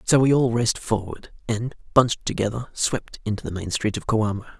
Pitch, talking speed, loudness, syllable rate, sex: 115 Hz, 195 wpm, -23 LUFS, 5.6 syllables/s, male